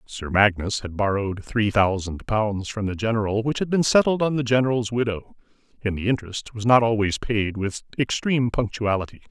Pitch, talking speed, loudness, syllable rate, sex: 110 Hz, 180 wpm, -23 LUFS, 5.4 syllables/s, male